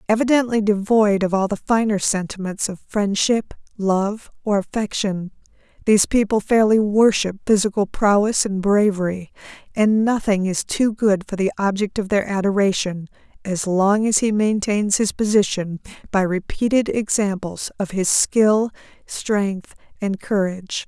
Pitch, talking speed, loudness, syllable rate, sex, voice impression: 205 Hz, 135 wpm, -19 LUFS, 4.5 syllables/s, female, feminine, adult-like, slightly soft, sincere, slightly friendly, slightly reassuring